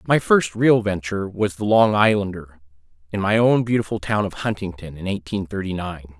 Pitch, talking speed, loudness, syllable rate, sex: 100 Hz, 185 wpm, -20 LUFS, 5.2 syllables/s, male